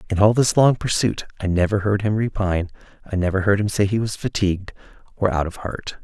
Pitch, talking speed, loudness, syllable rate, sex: 100 Hz, 220 wpm, -21 LUFS, 5.9 syllables/s, male